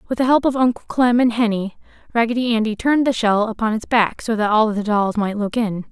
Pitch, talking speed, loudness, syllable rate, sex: 225 Hz, 245 wpm, -18 LUFS, 5.9 syllables/s, female